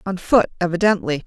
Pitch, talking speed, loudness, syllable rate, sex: 185 Hz, 140 wpm, -18 LUFS, 5.9 syllables/s, female